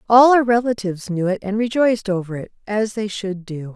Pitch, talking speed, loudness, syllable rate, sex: 210 Hz, 210 wpm, -19 LUFS, 5.5 syllables/s, female